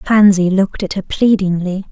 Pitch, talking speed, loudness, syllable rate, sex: 195 Hz, 155 wpm, -14 LUFS, 5.1 syllables/s, female